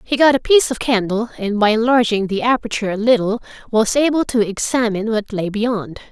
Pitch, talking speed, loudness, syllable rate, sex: 225 Hz, 195 wpm, -17 LUFS, 5.8 syllables/s, female